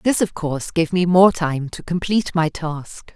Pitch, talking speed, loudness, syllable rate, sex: 170 Hz, 210 wpm, -19 LUFS, 4.6 syllables/s, female